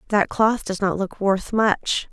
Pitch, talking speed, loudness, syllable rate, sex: 205 Hz, 200 wpm, -21 LUFS, 3.8 syllables/s, female